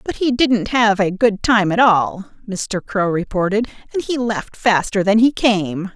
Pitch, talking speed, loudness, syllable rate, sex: 210 Hz, 190 wpm, -17 LUFS, 4.2 syllables/s, female